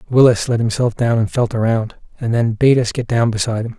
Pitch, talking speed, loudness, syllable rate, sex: 115 Hz, 240 wpm, -17 LUFS, 5.9 syllables/s, male